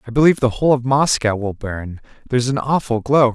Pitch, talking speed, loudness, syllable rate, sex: 125 Hz, 215 wpm, -18 LUFS, 6.1 syllables/s, male